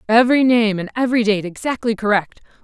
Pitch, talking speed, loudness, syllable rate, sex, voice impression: 225 Hz, 160 wpm, -17 LUFS, 6.4 syllables/s, female, feminine, adult-like, slightly powerful, clear, fluent, intellectual, calm, slightly friendly, unique, lively, slightly strict, slightly intense, slightly sharp